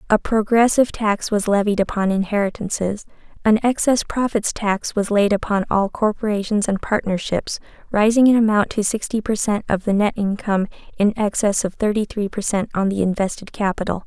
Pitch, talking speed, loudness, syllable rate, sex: 210 Hz, 170 wpm, -19 LUFS, 5.4 syllables/s, female